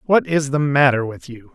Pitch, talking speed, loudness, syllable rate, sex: 145 Hz, 235 wpm, -18 LUFS, 5.0 syllables/s, male